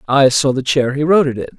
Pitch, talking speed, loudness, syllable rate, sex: 140 Hz, 300 wpm, -14 LUFS, 6.8 syllables/s, male